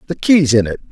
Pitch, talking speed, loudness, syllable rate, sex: 140 Hz, 265 wpm, -13 LUFS, 6.3 syllables/s, male